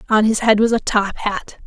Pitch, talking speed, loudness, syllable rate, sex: 215 Hz, 250 wpm, -17 LUFS, 5.0 syllables/s, female